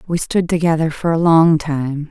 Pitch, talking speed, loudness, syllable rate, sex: 160 Hz, 200 wpm, -16 LUFS, 4.6 syllables/s, female